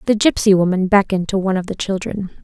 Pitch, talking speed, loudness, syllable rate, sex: 195 Hz, 220 wpm, -17 LUFS, 6.9 syllables/s, female